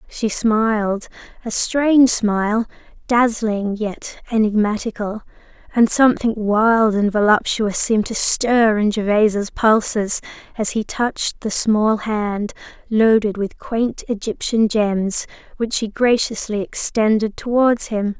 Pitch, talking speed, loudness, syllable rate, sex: 220 Hz, 110 wpm, -18 LUFS, 3.9 syllables/s, female